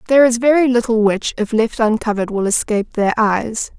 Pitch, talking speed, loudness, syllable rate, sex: 225 Hz, 190 wpm, -16 LUFS, 5.8 syllables/s, female